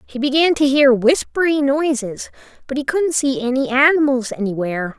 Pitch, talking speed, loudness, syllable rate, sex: 270 Hz, 155 wpm, -17 LUFS, 5.1 syllables/s, female